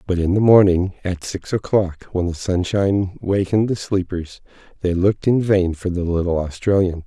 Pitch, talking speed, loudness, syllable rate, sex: 95 Hz, 180 wpm, -19 LUFS, 5.1 syllables/s, male